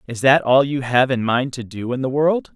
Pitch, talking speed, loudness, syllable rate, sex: 130 Hz, 280 wpm, -18 LUFS, 5.0 syllables/s, male